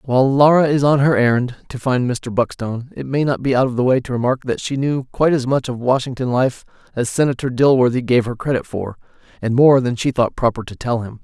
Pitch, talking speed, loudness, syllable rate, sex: 125 Hz, 240 wpm, -18 LUFS, 5.8 syllables/s, male